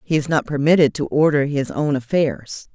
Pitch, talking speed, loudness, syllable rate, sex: 145 Hz, 195 wpm, -18 LUFS, 5.0 syllables/s, female